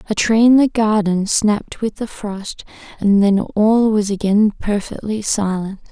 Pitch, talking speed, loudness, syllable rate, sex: 210 Hz, 160 wpm, -16 LUFS, 4.2 syllables/s, female